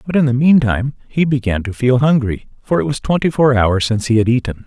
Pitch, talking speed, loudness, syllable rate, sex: 125 Hz, 245 wpm, -15 LUFS, 6.1 syllables/s, male